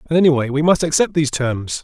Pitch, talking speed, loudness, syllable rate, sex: 150 Hz, 230 wpm, -17 LUFS, 6.4 syllables/s, male